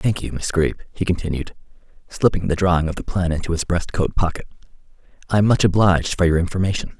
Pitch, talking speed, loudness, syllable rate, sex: 90 Hz, 205 wpm, -20 LUFS, 6.5 syllables/s, male